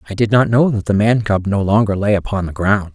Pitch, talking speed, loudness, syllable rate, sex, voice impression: 105 Hz, 285 wpm, -16 LUFS, 5.8 syllables/s, male, masculine, middle-aged, tensed, powerful, clear, raspy, cool, intellectual, sincere, calm, wild, lively